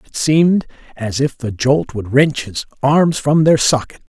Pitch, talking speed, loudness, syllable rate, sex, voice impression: 140 Hz, 190 wpm, -15 LUFS, 4.3 syllables/s, male, very masculine, slightly old, thick, slightly muffled, slightly cool, wild